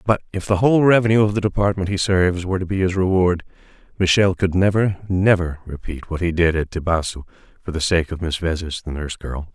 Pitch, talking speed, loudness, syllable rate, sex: 90 Hz, 215 wpm, -19 LUFS, 6.2 syllables/s, male